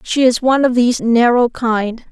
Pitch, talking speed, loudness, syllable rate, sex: 240 Hz, 170 wpm, -14 LUFS, 4.6 syllables/s, female